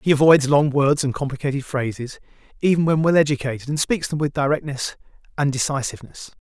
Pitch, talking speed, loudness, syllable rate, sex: 140 Hz, 160 wpm, -20 LUFS, 5.9 syllables/s, male